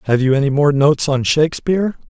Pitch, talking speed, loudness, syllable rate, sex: 145 Hz, 200 wpm, -15 LUFS, 5.9 syllables/s, male